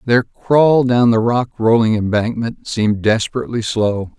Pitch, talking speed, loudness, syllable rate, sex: 115 Hz, 145 wpm, -16 LUFS, 4.5 syllables/s, male